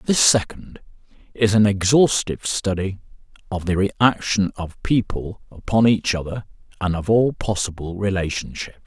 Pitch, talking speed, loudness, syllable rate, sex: 100 Hz, 130 wpm, -20 LUFS, 4.6 syllables/s, male